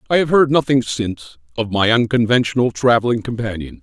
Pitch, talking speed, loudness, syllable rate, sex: 120 Hz, 155 wpm, -17 LUFS, 5.8 syllables/s, male